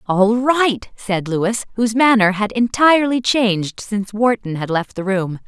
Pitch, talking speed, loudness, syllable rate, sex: 215 Hz, 165 wpm, -17 LUFS, 4.5 syllables/s, female